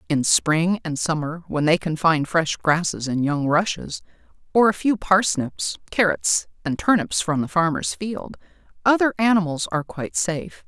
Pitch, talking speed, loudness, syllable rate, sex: 160 Hz, 165 wpm, -21 LUFS, 4.6 syllables/s, female